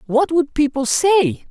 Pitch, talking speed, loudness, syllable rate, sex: 290 Hz, 160 wpm, -17 LUFS, 3.9 syllables/s, female